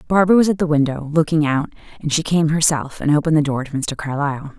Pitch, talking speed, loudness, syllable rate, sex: 150 Hz, 235 wpm, -18 LUFS, 6.7 syllables/s, female